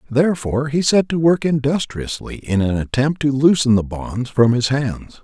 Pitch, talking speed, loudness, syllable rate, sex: 135 Hz, 185 wpm, -18 LUFS, 4.8 syllables/s, male